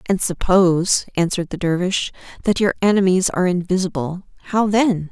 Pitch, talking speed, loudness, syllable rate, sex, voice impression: 185 Hz, 140 wpm, -19 LUFS, 5.5 syllables/s, female, feminine, adult-like, slightly refreshing, sincere, friendly, slightly elegant